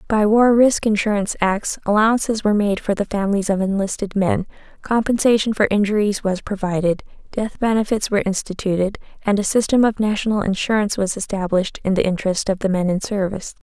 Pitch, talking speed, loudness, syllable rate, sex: 205 Hz, 170 wpm, -19 LUFS, 6.2 syllables/s, female